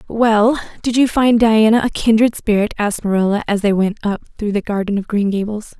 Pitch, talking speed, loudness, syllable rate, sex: 215 Hz, 205 wpm, -16 LUFS, 5.6 syllables/s, female